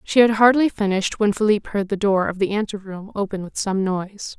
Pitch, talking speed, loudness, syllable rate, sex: 205 Hz, 235 wpm, -20 LUFS, 5.7 syllables/s, female